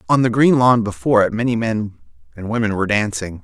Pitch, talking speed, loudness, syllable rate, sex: 110 Hz, 210 wpm, -17 LUFS, 6.2 syllables/s, male